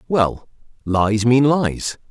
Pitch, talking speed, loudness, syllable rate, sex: 120 Hz, 115 wpm, -18 LUFS, 2.7 syllables/s, male